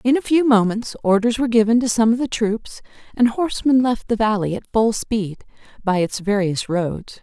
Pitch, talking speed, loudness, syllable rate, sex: 220 Hz, 200 wpm, -19 LUFS, 5.2 syllables/s, female